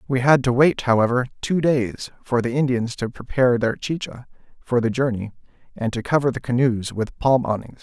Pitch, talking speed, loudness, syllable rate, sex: 125 Hz, 190 wpm, -21 LUFS, 5.3 syllables/s, male